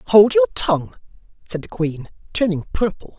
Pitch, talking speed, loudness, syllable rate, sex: 195 Hz, 150 wpm, -19 LUFS, 5.1 syllables/s, male